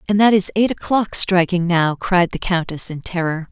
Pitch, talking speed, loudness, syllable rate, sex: 180 Hz, 205 wpm, -18 LUFS, 4.9 syllables/s, female